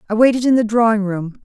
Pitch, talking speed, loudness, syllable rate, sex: 220 Hz, 250 wpm, -16 LUFS, 6.4 syllables/s, female